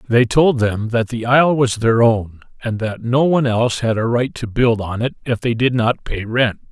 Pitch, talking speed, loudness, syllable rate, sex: 120 Hz, 240 wpm, -17 LUFS, 4.9 syllables/s, male